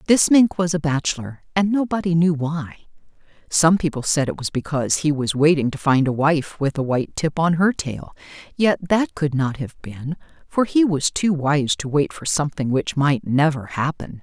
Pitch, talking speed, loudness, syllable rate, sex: 155 Hz, 200 wpm, -20 LUFS, 4.9 syllables/s, female